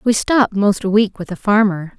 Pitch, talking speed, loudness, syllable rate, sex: 205 Hz, 240 wpm, -16 LUFS, 5.3 syllables/s, female